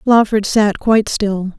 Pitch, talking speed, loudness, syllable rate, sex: 205 Hz, 150 wpm, -15 LUFS, 4.1 syllables/s, female